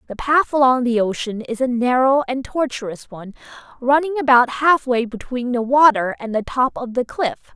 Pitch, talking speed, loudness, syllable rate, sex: 255 Hz, 185 wpm, -18 LUFS, 4.8 syllables/s, female